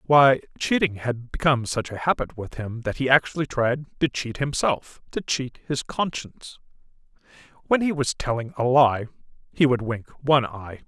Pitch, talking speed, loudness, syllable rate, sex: 130 Hz, 165 wpm, -23 LUFS, 4.8 syllables/s, male